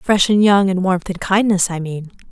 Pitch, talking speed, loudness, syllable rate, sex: 190 Hz, 235 wpm, -16 LUFS, 4.9 syllables/s, female